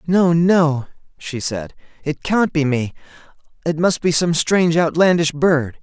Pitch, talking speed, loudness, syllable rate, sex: 160 Hz, 155 wpm, -17 LUFS, 4.2 syllables/s, male